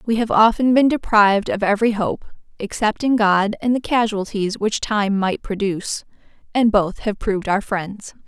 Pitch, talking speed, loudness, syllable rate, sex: 210 Hz, 175 wpm, -19 LUFS, 4.8 syllables/s, female